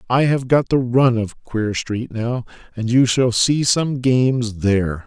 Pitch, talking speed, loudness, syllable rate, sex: 120 Hz, 190 wpm, -18 LUFS, 3.9 syllables/s, male